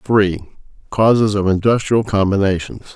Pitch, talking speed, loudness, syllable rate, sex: 100 Hz, 100 wpm, -16 LUFS, 4.7 syllables/s, male